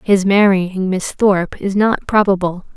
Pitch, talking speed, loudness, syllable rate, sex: 195 Hz, 150 wpm, -15 LUFS, 4.3 syllables/s, female